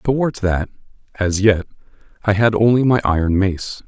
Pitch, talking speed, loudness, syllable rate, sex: 105 Hz, 155 wpm, -17 LUFS, 4.8 syllables/s, male